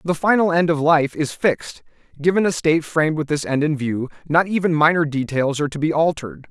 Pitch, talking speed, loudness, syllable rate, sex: 155 Hz, 220 wpm, -19 LUFS, 6.0 syllables/s, male